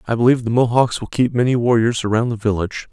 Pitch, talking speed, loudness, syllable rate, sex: 115 Hz, 225 wpm, -17 LUFS, 6.9 syllables/s, male